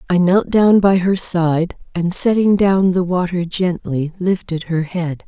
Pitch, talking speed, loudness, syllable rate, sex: 180 Hz, 170 wpm, -16 LUFS, 3.9 syllables/s, female